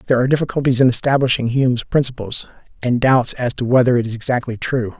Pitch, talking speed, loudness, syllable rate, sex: 125 Hz, 190 wpm, -17 LUFS, 6.7 syllables/s, male